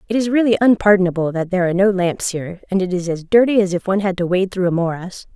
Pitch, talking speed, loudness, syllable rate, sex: 190 Hz, 270 wpm, -17 LUFS, 7.0 syllables/s, female